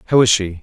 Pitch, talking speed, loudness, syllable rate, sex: 105 Hz, 290 wpm, -14 LUFS, 7.7 syllables/s, male